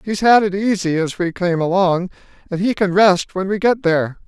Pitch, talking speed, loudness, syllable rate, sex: 190 Hz, 225 wpm, -17 LUFS, 5.1 syllables/s, male